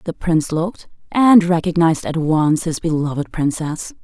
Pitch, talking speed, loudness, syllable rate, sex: 165 Hz, 150 wpm, -17 LUFS, 5.0 syllables/s, female